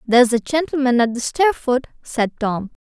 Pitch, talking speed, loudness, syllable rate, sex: 250 Hz, 170 wpm, -19 LUFS, 5.0 syllables/s, female